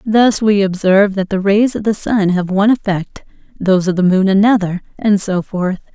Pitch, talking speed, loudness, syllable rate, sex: 195 Hz, 200 wpm, -14 LUFS, 5.1 syllables/s, female